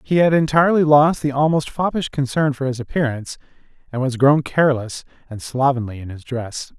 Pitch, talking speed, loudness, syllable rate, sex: 135 Hz, 175 wpm, -18 LUFS, 5.6 syllables/s, male